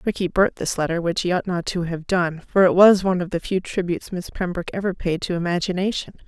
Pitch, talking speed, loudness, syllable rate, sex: 180 Hz, 240 wpm, -21 LUFS, 6.1 syllables/s, female